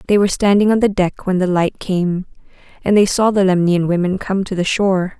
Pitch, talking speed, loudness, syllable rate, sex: 190 Hz, 230 wpm, -16 LUFS, 5.7 syllables/s, female